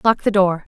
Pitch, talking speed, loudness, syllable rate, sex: 195 Hz, 235 wpm, -17 LUFS, 5.1 syllables/s, female